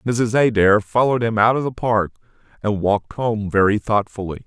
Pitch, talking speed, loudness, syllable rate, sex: 110 Hz, 175 wpm, -19 LUFS, 5.1 syllables/s, male